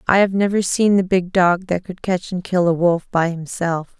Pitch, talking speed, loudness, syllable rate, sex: 180 Hz, 240 wpm, -18 LUFS, 4.8 syllables/s, female